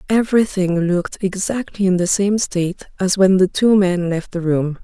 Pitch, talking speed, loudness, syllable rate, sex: 190 Hz, 185 wpm, -17 LUFS, 5.0 syllables/s, female